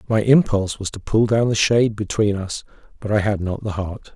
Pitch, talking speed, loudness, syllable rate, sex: 105 Hz, 230 wpm, -20 LUFS, 5.5 syllables/s, male